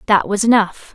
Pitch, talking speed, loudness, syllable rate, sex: 205 Hz, 190 wpm, -16 LUFS, 5.2 syllables/s, female